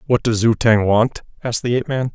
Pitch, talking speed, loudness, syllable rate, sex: 115 Hz, 250 wpm, -17 LUFS, 6.2 syllables/s, male